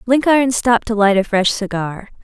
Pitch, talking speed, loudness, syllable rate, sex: 220 Hz, 190 wpm, -15 LUFS, 5.5 syllables/s, female